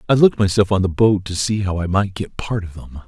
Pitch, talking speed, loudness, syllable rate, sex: 100 Hz, 295 wpm, -18 LUFS, 5.9 syllables/s, male